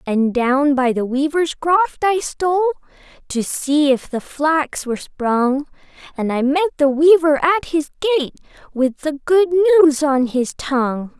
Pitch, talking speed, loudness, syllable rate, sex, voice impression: 295 Hz, 160 wpm, -17 LUFS, 4.1 syllables/s, female, very feminine, very young, very thin, very tensed, powerful, very bright, hard, very clear, very fluent, very cute, slightly intellectual, refreshing, sincere, very calm, very friendly, reassuring, very unique, very elegant, wild, very sweet, very lively, very kind, slightly intense, sharp, very light